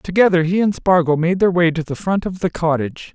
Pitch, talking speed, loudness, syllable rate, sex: 175 Hz, 250 wpm, -17 LUFS, 5.8 syllables/s, male